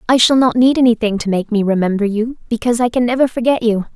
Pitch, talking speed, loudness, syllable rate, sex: 230 Hz, 245 wpm, -15 LUFS, 6.7 syllables/s, female